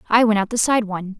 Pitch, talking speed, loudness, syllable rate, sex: 215 Hz, 300 wpm, -19 LUFS, 6.9 syllables/s, female